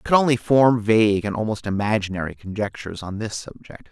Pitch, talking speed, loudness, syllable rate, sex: 110 Hz, 185 wpm, -21 LUFS, 5.9 syllables/s, male